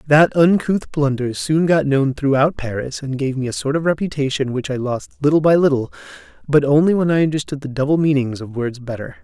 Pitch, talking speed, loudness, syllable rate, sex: 145 Hz, 210 wpm, -18 LUFS, 5.6 syllables/s, male